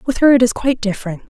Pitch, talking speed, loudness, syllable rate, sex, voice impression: 230 Hz, 270 wpm, -15 LUFS, 8.0 syllables/s, female, feminine, adult-like, slightly soft, slightly intellectual, calm, slightly sweet